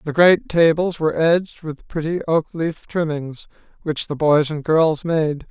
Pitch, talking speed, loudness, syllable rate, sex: 160 Hz, 175 wpm, -19 LUFS, 4.4 syllables/s, male